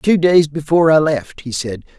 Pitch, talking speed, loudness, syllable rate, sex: 150 Hz, 210 wpm, -15 LUFS, 5.0 syllables/s, male